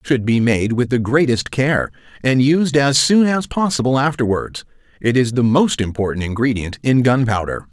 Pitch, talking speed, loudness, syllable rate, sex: 130 Hz, 180 wpm, -17 LUFS, 4.9 syllables/s, male